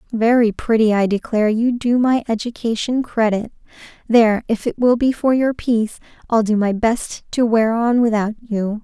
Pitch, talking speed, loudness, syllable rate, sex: 225 Hz, 170 wpm, -18 LUFS, 5.0 syllables/s, female